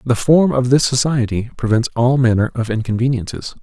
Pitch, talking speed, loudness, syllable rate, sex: 125 Hz, 165 wpm, -16 LUFS, 5.5 syllables/s, male